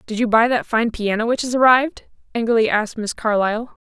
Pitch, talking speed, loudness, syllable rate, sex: 225 Hz, 205 wpm, -18 LUFS, 6.2 syllables/s, female